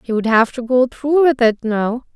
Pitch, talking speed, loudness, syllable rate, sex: 245 Hz, 250 wpm, -16 LUFS, 4.5 syllables/s, female